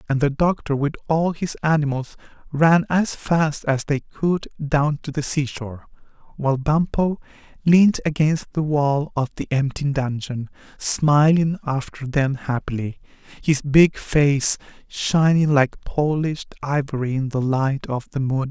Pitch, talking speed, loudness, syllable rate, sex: 145 Hz, 145 wpm, -21 LUFS, 4.1 syllables/s, male